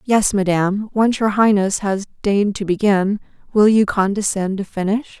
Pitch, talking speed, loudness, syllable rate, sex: 205 Hz, 160 wpm, -18 LUFS, 4.9 syllables/s, female